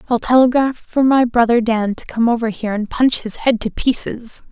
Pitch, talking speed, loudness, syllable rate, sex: 235 Hz, 210 wpm, -16 LUFS, 5.1 syllables/s, female